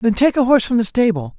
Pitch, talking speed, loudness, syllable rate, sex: 225 Hz, 305 wpm, -16 LUFS, 6.7 syllables/s, male